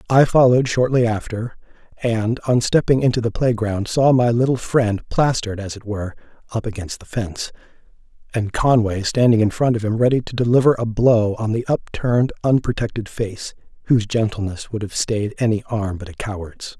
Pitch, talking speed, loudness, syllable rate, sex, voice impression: 115 Hz, 175 wpm, -19 LUFS, 5.3 syllables/s, male, masculine, middle-aged, tensed, powerful, slightly dark, slightly muffled, slightly raspy, calm, mature, slightly friendly, reassuring, wild, lively, slightly kind